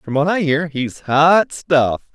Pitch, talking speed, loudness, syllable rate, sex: 150 Hz, 195 wpm, -16 LUFS, 3.6 syllables/s, male